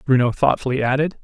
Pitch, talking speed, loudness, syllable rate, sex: 135 Hz, 145 wpm, -19 LUFS, 6.4 syllables/s, male